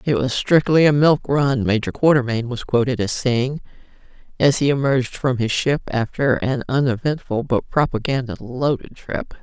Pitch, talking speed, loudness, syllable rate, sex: 130 Hz, 160 wpm, -19 LUFS, 4.8 syllables/s, female